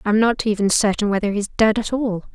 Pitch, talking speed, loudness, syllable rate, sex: 210 Hz, 280 wpm, -19 LUFS, 6.4 syllables/s, female